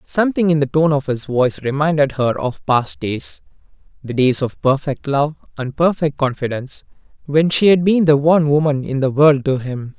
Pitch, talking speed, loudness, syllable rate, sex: 145 Hz, 185 wpm, -17 LUFS, 5.1 syllables/s, male